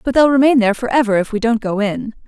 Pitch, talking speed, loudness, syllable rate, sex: 235 Hz, 290 wpm, -15 LUFS, 6.7 syllables/s, female